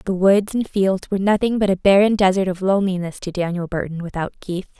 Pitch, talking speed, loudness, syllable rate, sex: 190 Hz, 200 wpm, -19 LUFS, 6.0 syllables/s, female